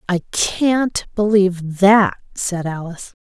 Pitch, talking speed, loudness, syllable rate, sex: 190 Hz, 110 wpm, -17 LUFS, 3.7 syllables/s, female